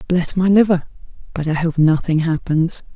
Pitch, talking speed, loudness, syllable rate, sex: 170 Hz, 160 wpm, -17 LUFS, 4.9 syllables/s, female